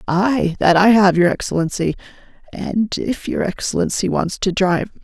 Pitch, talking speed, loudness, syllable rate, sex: 190 Hz, 155 wpm, -17 LUFS, 4.8 syllables/s, female